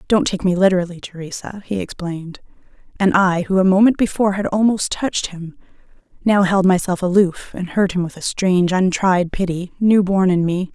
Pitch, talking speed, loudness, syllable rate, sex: 185 Hz, 185 wpm, -18 LUFS, 5.4 syllables/s, female